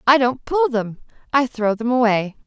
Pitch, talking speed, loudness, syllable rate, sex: 245 Hz, 195 wpm, -19 LUFS, 4.7 syllables/s, female